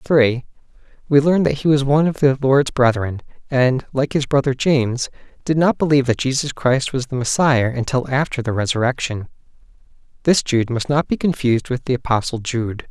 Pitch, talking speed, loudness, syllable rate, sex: 130 Hz, 180 wpm, -18 LUFS, 5.3 syllables/s, male